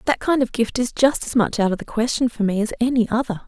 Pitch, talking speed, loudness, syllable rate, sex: 235 Hz, 295 wpm, -20 LUFS, 6.2 syllables/s, female